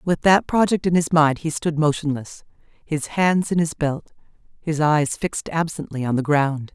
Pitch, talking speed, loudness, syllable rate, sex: 155 Hz, 180 wpm, -21 LUFS, 4.5 syllables/s, female